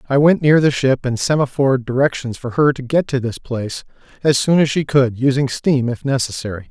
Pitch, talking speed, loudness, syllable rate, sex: 135 Hz, 215 wpm, -17 LUFS, 5.6 syllables/s, male